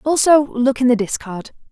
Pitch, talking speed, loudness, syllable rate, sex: 255 Hz, 175 wpm, -16 LUFS, 4.9 syllables/s, female